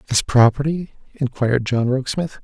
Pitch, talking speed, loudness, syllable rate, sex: 135 Hz, 125 wpm, -19 LUFS, 5.4 syllables/s, male